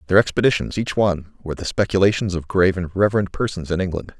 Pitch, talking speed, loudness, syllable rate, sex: 95 Hz, 200 wpm, -20 LUFS, 7.0 syllables/s, male